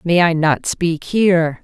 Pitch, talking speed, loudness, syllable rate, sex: 170 Hz, 185 wpm, -16 LUFS, 3.9 syllables/s, female